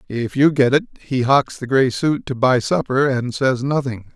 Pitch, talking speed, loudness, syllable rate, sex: 130 Hz, 215 wpm, -18 LUFS, 4.5 syllables/s, male